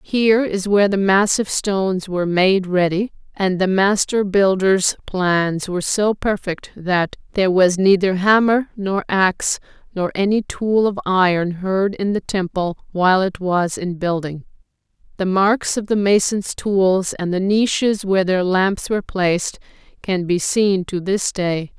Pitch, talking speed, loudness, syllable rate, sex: 190 Hz, 160 wpm, -18 LUFS, 4.2 syllables/s, female